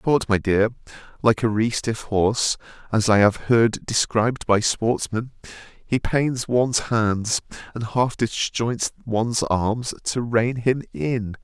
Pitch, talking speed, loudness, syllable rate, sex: 115 Hz, 145 wpm, -22 LUFS, 3.1 syllables/s, male